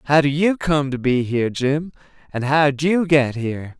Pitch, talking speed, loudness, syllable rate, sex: 145 Hz, 205 wpm, -19 LUFS, 4.6 syllables/s, male